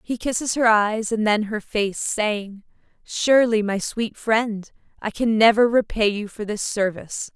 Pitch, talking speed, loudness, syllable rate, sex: 215 Hz, 170 wpm, -21 LUFS, 4.3 syllables/s, female